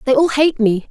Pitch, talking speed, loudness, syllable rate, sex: 265 Hz, 265 wpm, -15 LUFS, 5.2 syllables/s, female